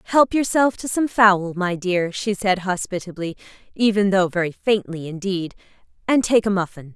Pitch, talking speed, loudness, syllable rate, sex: 195 Hz, 165 wpm, -20 LUFS, 4.8 syllables/s, female